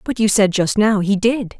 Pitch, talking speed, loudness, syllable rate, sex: 205 Hz, 265 wpm, -16 LUFS, 4.7 syllables/s, female